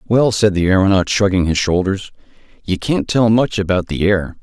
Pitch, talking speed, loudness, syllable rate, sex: 100 Hz, 190 wpm, -16 LUFS, 5.1 syllables/s, male